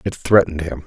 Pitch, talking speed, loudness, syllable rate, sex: 85 Hz, 210 wpm, -17 LUFS, 6.5 syllables/s, male